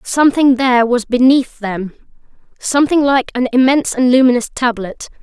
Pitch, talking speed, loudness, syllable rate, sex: 250 Hz, 125 wpm, -13 LUFS, 5.2 syllables/s, female